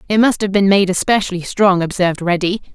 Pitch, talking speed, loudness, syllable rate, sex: 190 Hz, 195 wpm, -15 LUFS, 6.1 syllables/s, female